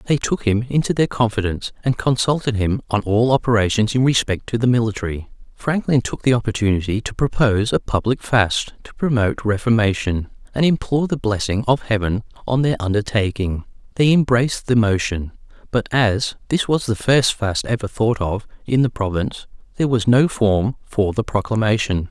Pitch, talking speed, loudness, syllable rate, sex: 115 Hz, 170 wpm, -19 LUFS, 5.4 syllables/s, male